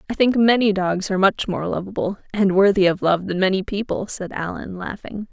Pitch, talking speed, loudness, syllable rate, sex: 195 Hz, 180 wpm, -20 LUFS, 5.5 syllables/s, female